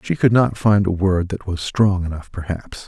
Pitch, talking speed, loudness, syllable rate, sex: 95 Hz, 230 wpm, -19 LUFS, 4.7 syllables/s, male